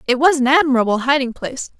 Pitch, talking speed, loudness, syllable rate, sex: 270 Hz, 200 wpm, -16 LUFS, 7.1 syllables/s, female